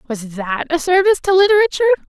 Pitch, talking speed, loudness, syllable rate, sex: 335 Hz, 170 wpm, -15 LUFS, 8.8 syllables/s, female